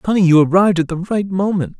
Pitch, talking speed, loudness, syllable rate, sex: 180 Hz, 235 wpm, -15 LUFS, 6.3 syllables/s, male